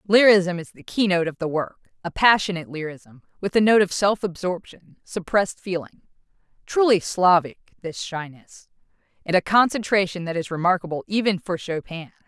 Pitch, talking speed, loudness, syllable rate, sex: 180 Hz, 140 wpm, -22 LUFS, 5.4 syllables/s, female